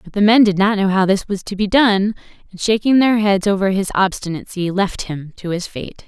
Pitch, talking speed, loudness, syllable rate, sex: 195 Hz, 235 wpm, -17 LUFS, 5.2 syllables/s, female